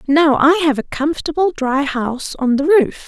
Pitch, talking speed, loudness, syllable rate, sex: 295 Hz, 195 wpm, -16 LUFS, 5.1 syllables/s, female